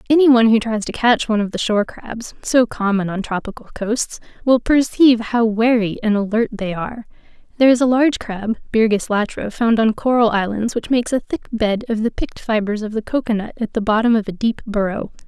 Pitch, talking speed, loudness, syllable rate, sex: 225 Hz, 215 wpm, -18 LUFS, 5.7 syllables/s, female